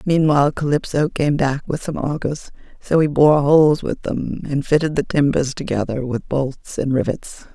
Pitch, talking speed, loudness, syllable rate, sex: 145 Hz, 175 wpm, -19 LUFS, 4.9 syllables/s, female